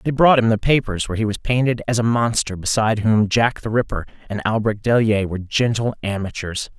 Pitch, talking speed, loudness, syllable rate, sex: 110 Hz, 205 wpm, -19 LUFS, 5.8 syllables/s, male